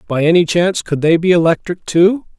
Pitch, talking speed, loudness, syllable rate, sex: 175 Hz, 200 wpm, -14 LUFS, 5.6 syllables/s, male